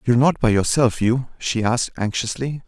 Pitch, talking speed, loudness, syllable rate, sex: 120 Hz, 180 wpm, -20 LUFS, 5.4 syllables/s, male